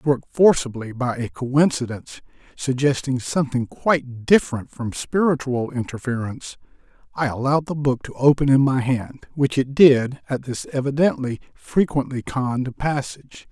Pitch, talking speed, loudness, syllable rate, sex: 135 Hz, 135 wpm, -21 LUFS, 4.9 syllables/s, male